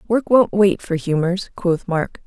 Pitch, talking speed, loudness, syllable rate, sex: 185 Hz, 185 wpm, -18 LUFS, 3.9 syllables/s, female